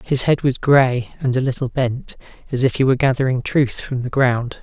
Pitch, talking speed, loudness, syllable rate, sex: 130 Hz, 220 wpm, -18 LUFS, 5.2 syllables/s, male